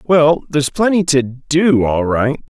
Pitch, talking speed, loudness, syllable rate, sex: 145 Hz, 160 wpm, -15 LUFS, 4.0 syllables/s, male